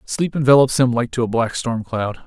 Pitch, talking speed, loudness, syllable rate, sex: 125 Hz, 240 wpm, -18 LUFS, 5.2 syllables/s, male